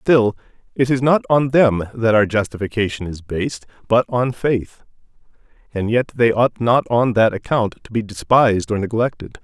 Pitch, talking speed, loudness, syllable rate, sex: 115 Hz, 170 wpm, -18 LUFS, 4.8 syllables/s, male